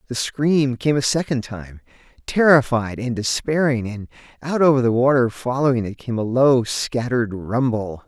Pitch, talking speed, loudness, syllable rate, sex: 125 Hz, 155 wpm, -19 LUFS, 4.6 syllables/s, male